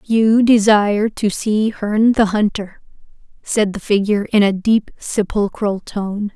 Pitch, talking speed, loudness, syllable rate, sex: 210 Hz, 140 wpm, -16 LUFS, 4.1 syllables/s, female